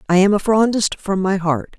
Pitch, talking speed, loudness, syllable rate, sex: 195 Hz, 235 wpm, -17 LUFS, 5.4 syllables/s, female